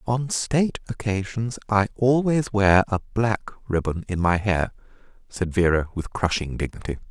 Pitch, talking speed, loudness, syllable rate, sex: 105 Hz, 145 wpm, -23 LUFS, 4.5 syllables/s, male